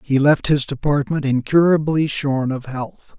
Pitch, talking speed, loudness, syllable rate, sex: 140 Hz, 150 wpm, -18 LUFS, 4.5 syllables/s, male